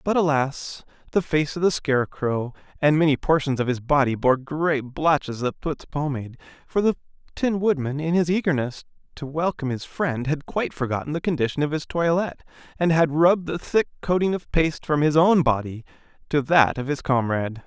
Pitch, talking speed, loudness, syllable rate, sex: 150 Hz, 185 wpm, -23 LUFS, 5.4 syllables/s, male